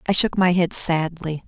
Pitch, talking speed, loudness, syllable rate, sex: 170 Hz, 205 wpm, -18 LUFS, 4.7 syllables/s, female